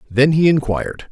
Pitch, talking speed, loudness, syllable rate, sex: 140 Hz, 160 wpm, -16 LUFS, 5.4 syllables/s, male